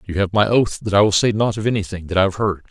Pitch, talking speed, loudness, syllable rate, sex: 100 Hz, 335 wpm, -18 LUFS, 6.9 syllables/s, male